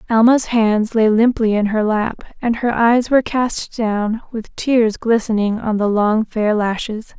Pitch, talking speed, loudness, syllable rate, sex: 225 Hz, 175 wpm, -17 LUFS, 4.0 syllables/s, female